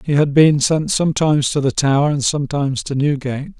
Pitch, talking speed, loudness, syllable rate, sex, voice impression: 145 Hz, 200 wpm, -16 LUFS, 6.2 syllables/s, male, masculine, slightly old, slightly thick, slightly muffled, calm, slightly reassuring, slightly kind